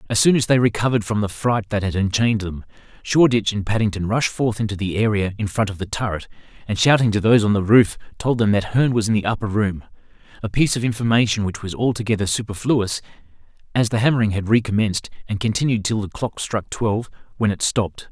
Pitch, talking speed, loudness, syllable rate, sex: 110 Hz, 210 wpm, -20 LUFS, 6.4 syllables/s, male